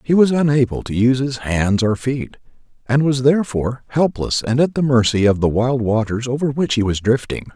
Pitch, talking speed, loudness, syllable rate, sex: 125 Hz, 205 wpm, -18 LUFS, 5.4 syllables/s, male